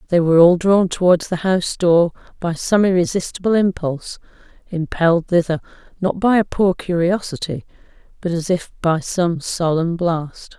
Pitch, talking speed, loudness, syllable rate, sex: 175 Hz, 140 wpm, -18 LUFS, 4.9 syllables/s, female